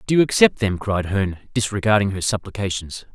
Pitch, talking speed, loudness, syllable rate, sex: 100 Hz, 170 wpm, -20 LUFS, 6.0 syllables/s, male